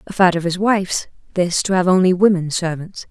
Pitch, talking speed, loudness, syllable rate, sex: 180 Hz, 210 wpm, -17 LUFS, 5.6 syllables/s, female